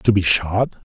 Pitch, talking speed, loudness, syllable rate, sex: 95 Hz, 195 wpm, -18 LUFS, 3.9 syllables/s, male